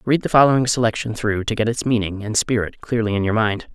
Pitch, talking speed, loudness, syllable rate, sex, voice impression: 110 Hz, 240 wpm, -19 LUFS, 6.1 syllables/s, male, masculine, adult-like, slightly middle-aged, slightly relaxed, slightly weak, slightly dark, hard, very clear, very fluent, slightly cool, very intellectual, slightly refreshing, slightly sincere, slightly calm, slightly friendly, very unique, slightly wild, slightly lively, slightly strict, slightly sharp, modest